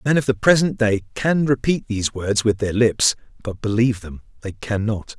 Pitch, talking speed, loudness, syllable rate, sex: 115 Hz, 195 wpm, -20 LUFS, 5.1 syllables/s, male